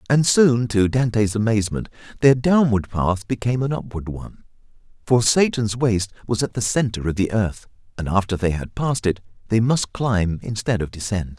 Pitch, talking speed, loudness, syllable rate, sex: 110 Hz, 180 wpm, -20 LUFS, 5.1 syllables/s, male